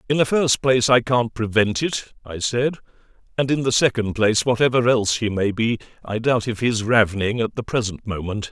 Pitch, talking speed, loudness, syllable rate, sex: 115 Hz, 205 wpm, -20 LUFS, 5.5 syllables/s, male